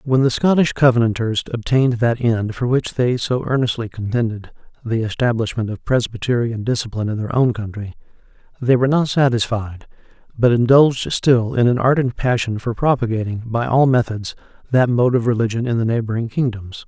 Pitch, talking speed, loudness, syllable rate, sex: 120 Hz, 165 wpm, -18 LUFS, 5.5 syllables/s, male